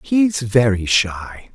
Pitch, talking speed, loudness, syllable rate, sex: 130 Hz, 115 wpm, -17 LUFS, 2.8 syllables/s, male